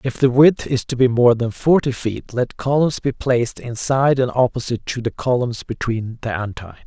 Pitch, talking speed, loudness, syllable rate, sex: 125 Hz, 200 wpm, -19 LUFS, 5.2 syllables/s, male